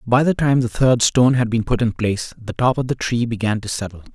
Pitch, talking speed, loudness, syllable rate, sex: 120 Hz, 275 wpm, -19 LUFS, 5.9 syllables/s, male